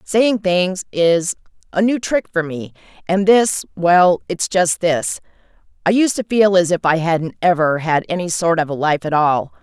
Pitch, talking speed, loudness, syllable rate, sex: 175 Hz, 185 wpm, -17 LUFS, 4.3 syllables/s, female